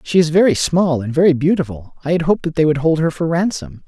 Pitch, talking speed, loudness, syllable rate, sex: 155 Hz, 265 wpm, -16 LUFS, 6.2 syllables/s, male